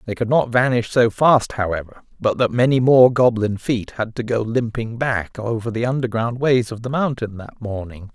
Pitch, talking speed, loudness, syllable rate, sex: 115 Hz, 200 wpm, -19 LUFS, 4.9 syllables/s, male